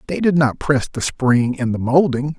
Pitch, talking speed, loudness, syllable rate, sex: 140 Hz, 225 wpm, -18 LUFS, 4.7 syllables/s, male